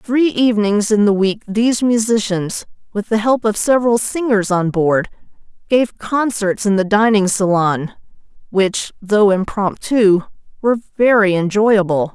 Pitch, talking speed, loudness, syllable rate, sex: 210 Hz, 135 wpm, -16 LUFS, 4.4 syllables/s, female